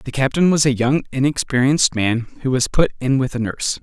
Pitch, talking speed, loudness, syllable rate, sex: 135 Hz, 220 wpm, -18 LUFS, 5.5 syllables/s, male